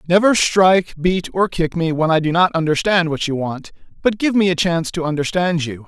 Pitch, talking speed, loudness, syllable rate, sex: 170 Hz, 225 wpm, -17 LUFS, 5.4 syllables/s, male